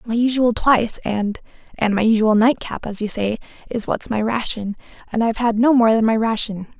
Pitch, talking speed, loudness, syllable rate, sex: 225 Hz, 205 wpm, -19 LUFS, 5.4 syllables/s, female